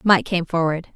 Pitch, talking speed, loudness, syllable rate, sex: 170 Hz, 190 wpm, -20 LUFS, 5.1 syllables/s, female